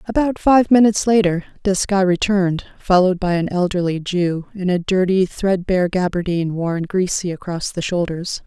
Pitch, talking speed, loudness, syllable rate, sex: 185 Hz, 150 wpm, -18 LUFS, 5.2 syllables/s, female